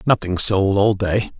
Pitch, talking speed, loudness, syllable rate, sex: 100 Hz, 170 wpm, -17 LUFS, 4.2 syllables/s, male